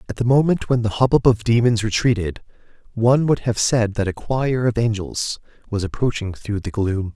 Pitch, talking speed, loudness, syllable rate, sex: 110 Hz, 195 wpm, -20 LUFS, 5.2 syllables/s, male